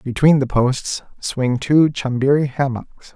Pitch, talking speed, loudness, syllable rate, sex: 135 Hz, 135 wpm, -18 LUFS, 3.7 syllables/s, male